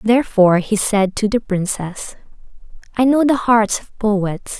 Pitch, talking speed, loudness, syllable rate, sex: 215 Hz, 155 wpm, -17 LUFS, 4.3 syllables/s, female